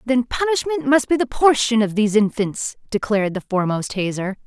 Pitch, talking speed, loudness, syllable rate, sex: 230 Hz, 175 wpm, -19 LUFS, 5.6 syllables/s, female